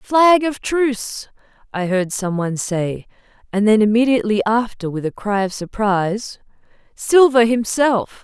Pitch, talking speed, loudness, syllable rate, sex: 220 Hz, 130 wpm, -17 LUFS, 4.5 syllables/s, female